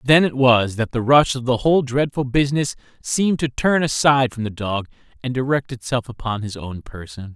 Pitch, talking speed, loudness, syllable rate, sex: 125 Hz, 205 wpm, -19 LUFS, 5.4 syllables/s, male